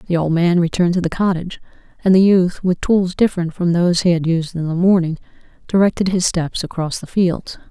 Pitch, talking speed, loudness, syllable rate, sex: 175 Hz, 210 wpm, -17 LUFS, 5.8 syllables/s, female